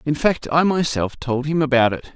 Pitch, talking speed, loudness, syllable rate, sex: 145 Hz, 220 wpm, -19 LUFS, 5.0 syllables/s, male